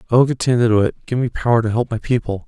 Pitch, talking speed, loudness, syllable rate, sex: 120 Hz, 220 wpm, -18 LUFS, 6.7 syllables/s, male